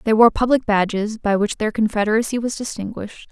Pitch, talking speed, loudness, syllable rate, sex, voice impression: 220 Hz, 180 wpm, -19 LUFS, 6.0 syllables/s, female, very feminine, slightly young, slightly adult-like, very thin, tensed, slightly powerful, very bright, slightly soft, very clear, fluent, cute, slightly cool, intellectual, very refreshing, calm, very friendly, reassuring, elegant, sweet, slightly lively, kind, slightly sharp